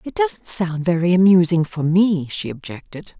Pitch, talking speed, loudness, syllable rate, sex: 175 Hz, 170 wpm, -18 LUFS, 4.6 syllables/s, female